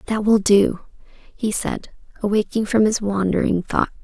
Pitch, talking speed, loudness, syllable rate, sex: 205 Hz, 150 wpm, -20 LUFS, 4.3 syllables/s, female